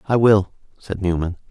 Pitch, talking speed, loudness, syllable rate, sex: 100 Hz, 160 wpm, -19 LUFS, 5.2 syllables/s, male